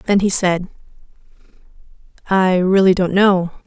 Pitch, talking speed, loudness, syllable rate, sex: 185 Hz, 115 wpm, -15 LUFS, 4.2 syllables/s, female